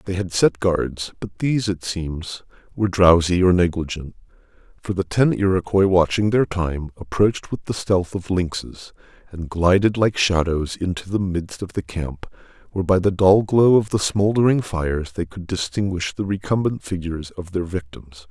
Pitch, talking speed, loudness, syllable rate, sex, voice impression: 90 Hz, 175 wpm, -20 LUFS, 4.8 syllables/s, male, masculine, adult-like, thick, tensed, powerful, soft, slightly muffled, intellectual, mature, friendly, wild, lively, slightly strict